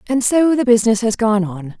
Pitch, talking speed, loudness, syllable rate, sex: 230 Hz, 235 wpm, -15 LUFS, 5.4 syllables/s, female